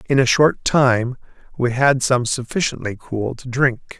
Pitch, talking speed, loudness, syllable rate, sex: 125 Hz, 165 wpm, -18 LUFS, 4.1 syllables/s, male